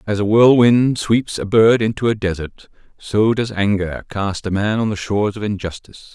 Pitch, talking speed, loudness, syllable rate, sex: 105 Hz, 195 wpm, -17 LUFS, 4.9 syllables/s, male